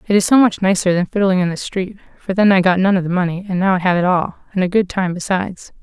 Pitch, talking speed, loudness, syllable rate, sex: 185 Hz, 300 wpm, -16 LUFS, 6.5 syllables/s, female